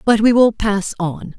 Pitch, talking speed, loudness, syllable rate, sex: 210 Hz, 215 wpm, -16 LUFS, 3.9 syllables/s, female